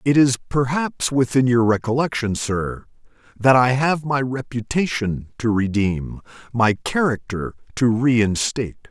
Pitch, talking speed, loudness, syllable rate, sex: 120 Hz, 120 wpm, -20 LUFS, 4.1 syllables/s, male